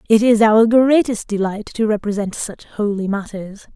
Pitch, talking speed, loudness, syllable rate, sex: 215 Hz, 160 wpm, -17 LUFS, 4.7 syllables/s, female